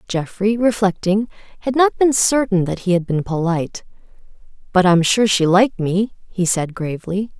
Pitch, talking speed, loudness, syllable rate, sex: 195 Hz, 170 wpm, -18 LUFS, 5.2 syllables/s, female